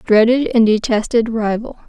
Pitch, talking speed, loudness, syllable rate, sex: 225 Hz, 130 wpm, -15 LUFS, 4.5 syllables/s, female